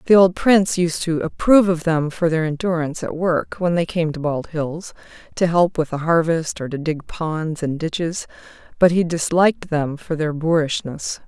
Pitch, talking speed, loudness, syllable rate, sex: 165 Hz, 195 wpm, -20 LUFS, 4.8 syllables/s, female